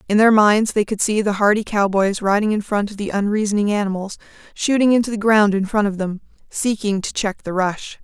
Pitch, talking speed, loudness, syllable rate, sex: 205 Hz, 215 wpm, -18 LUFS, 5.6 syllables/s, female